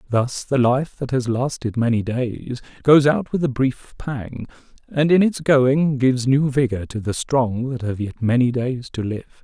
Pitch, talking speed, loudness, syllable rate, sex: 130 Hz, 195 wpm, -20 LUFS, 4.4 syllables/s, male